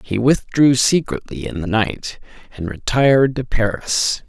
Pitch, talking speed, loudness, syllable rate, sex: 115 Hz, 140 wpm, -18 LUFS, 4.2 syllables/s, male